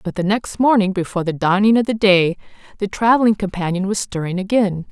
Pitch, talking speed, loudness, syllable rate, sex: 200 Hz, 195 wpm, -17 LUFS, 6.0 syllables/s, female